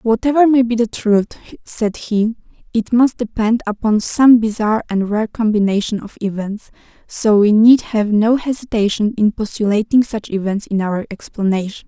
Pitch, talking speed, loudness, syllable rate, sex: 220 Hz, 155 wpm, -16 LUFS, 4.8 syllables/s, female